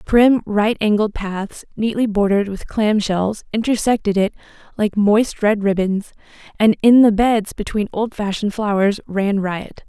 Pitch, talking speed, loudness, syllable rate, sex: 210 Hz, 140 wpm, -18 LUFS, 4.4 syllables/s, female